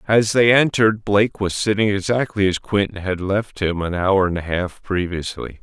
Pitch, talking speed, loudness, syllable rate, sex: 100 Hz, 190 wpm, -19 LUFS, 4.9 syllables/s, male